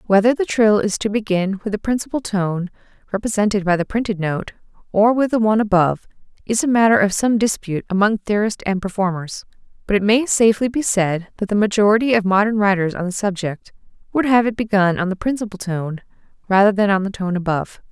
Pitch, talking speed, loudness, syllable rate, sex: 205 Hz, 200 wpm, -18 LUFS, 5.7 syllables/s, female